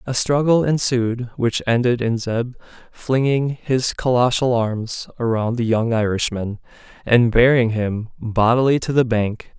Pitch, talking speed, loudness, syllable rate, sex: 120 Hz, 140 wpm, -19 LUFS, 4.1 syllables/s, male